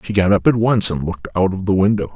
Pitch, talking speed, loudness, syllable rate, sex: 100 Hz, 305 wpm, -17 LUFS, 6.6 syllables/s, male